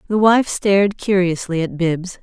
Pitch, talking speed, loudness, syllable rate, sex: 185 Hz, 160 wpm, -17 LUFS, 4.4 syllables/s, female